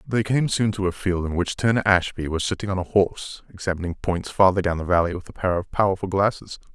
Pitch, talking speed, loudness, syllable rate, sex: 95 Hz, 240 wpm, -22 LUFS, 6.1 syllables/s, male